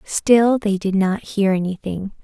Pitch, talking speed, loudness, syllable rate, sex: 200 Hz, 160 wpm, -18 LUFS, 3.9 syllables/s, female